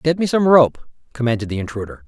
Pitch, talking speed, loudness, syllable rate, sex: 135 Hz, 200 wpm, -17 LUFS, 6.2 syllables/s, male